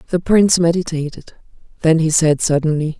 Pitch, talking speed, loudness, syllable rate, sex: 160 Hz, 140 wpm, -15 LUFS, 5.7 syllables/s, female